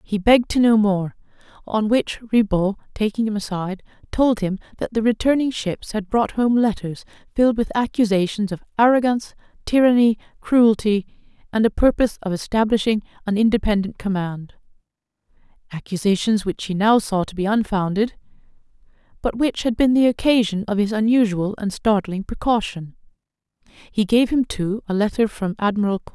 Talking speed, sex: 145 wpm, female